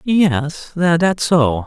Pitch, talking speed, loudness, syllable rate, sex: 160 Hz, 110 wpm, -16 LUFS, 2.0 syllables/s, male